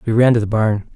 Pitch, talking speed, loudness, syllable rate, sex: 110 Hz, 315 wpm, -16 LUFS, 6.3 syllables/s, male